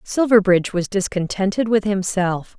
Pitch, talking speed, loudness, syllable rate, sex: 195 Hz, 115 wpm, -19 LUFS, 4.8 syllables/s, female